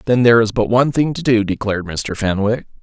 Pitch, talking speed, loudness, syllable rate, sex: 110 Hz, 235 wpm, -16 LUFS, 6.3 syllables/s, male